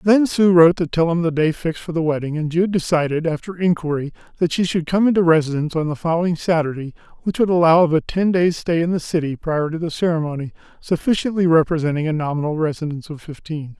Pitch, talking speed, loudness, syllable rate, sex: 165 Hz, 215 wpm, -19 LUFS, 6.4 syllables/s, male